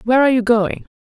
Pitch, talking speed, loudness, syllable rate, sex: 230 Hz, 235 wpm, -16 LUFS, 7.6 syllables/s, female